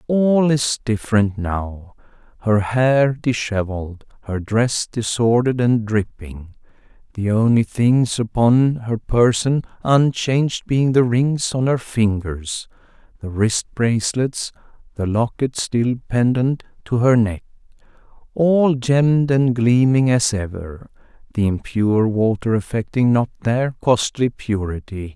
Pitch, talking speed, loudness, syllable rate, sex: 115 Hz, 115 wpm, -18 LUFS, 3.9 syllables/s, male